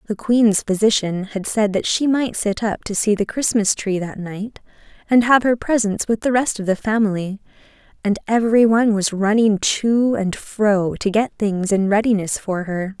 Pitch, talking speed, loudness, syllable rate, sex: 210 Hz, 195 wpm, -18 LUFS, 4.7 syllables/s, female